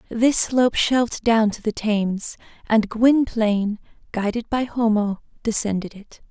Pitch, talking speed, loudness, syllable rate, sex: 225 Hz, 135 wpm, -21 LUFS, 4.4 syllables/s, female